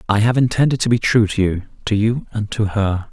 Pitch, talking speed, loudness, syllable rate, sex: 110 Hz, 230 wpm, -18 LUFS, 5.6 syllables/s, male